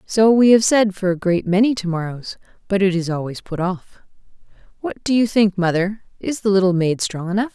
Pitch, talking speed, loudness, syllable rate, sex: 195 Hz, 205 wpm, -18 LUFS, 5.4 syllables/s, female